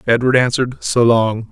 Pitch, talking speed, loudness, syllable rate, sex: 120 Hz, 160 wpm, -15 LUFS, 5.1 syllables/s, male